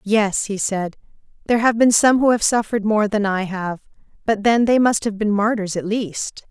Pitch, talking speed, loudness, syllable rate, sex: 210 Hz, 210 wpm, -18 LUFS, 5.0 syllables/s, female